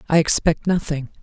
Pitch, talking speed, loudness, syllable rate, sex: 160 Hz, 145 wpm, -19 LUFS, 5.3 syllables/s, female